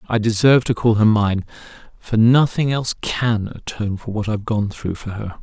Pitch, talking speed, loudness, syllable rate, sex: 110 Hz, 200 wpm, -19 LUFS, 5.3 syllables/s, male